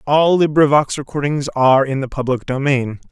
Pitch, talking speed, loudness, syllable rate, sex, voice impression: 140 Hz, 155 wpm, -16 LUFS, 5.2 syllables/s, male, masculine, adult-like, slightly powerful, refreshing, slightly sincere, slightly intense